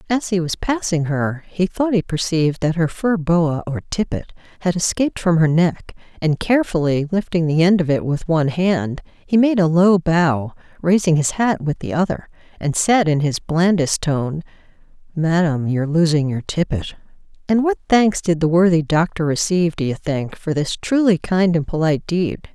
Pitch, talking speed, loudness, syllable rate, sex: 170 Hz, 190 wpm, -18 LUFS, 4.9 syllables/s, female